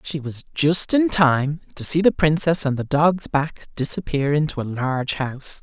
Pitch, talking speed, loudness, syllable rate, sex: 150 Hz, 190 wpm, -20 LUFS, 4.6 syllables/s, male